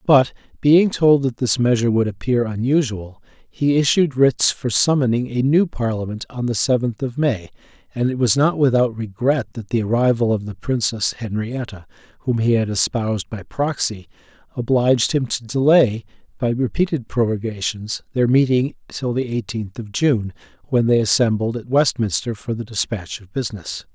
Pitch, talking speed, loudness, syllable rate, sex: 120 Hz, 165 wpm, -19 LUFS, 4.9 syllables/s, male